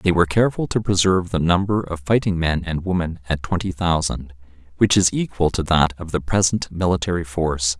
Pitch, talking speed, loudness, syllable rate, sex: 85 Hz, 195 wpm, -20 LUFS, 5.7 syllables/s, male